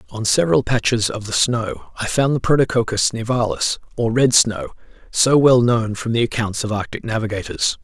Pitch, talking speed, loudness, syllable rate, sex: 115 Hz, 175 wpm, -18 LUFS, 5.2 syllables/s, male